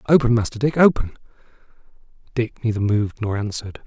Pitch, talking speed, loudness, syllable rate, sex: 115 Hz, 140 wpm, -20 LUFS, 6.5 syllables/s, male